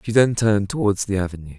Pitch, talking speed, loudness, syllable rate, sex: 105 Hz, 225 wpm, -20 LUFS, 6.8 syllables/s, male